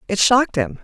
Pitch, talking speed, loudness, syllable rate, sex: 225 Hz, 215 wpm, -16 LUFS, 6.3 syllables/s, female